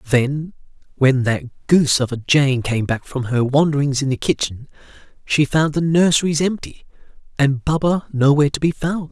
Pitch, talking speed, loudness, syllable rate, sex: 140 Hz, 170 wpm, -18 LUFS, 4.8 syllables/s, male